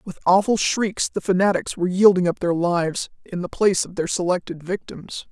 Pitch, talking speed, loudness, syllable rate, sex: 185 Hz, 190 wpm, -21 LUFS, 5.5 syllables/s, female